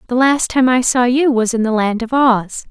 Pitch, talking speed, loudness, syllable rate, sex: 245 Hz, 265 wpm, -14 LUFS, 4.8 syllables/s, female